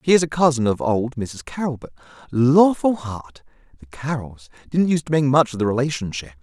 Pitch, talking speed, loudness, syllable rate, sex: 130 Hz, 195 wpm, -20 LUFS, 5.3 syllables/s, male